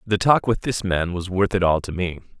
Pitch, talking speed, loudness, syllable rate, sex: 95 Hz, 275 wpm, -21 LUFS, 5.2 syllables/s, male